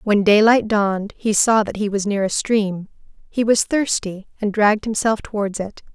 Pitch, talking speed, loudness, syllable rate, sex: 210 Hz, 190 wpm, -19 LUFS, 4.8 syllables/s, female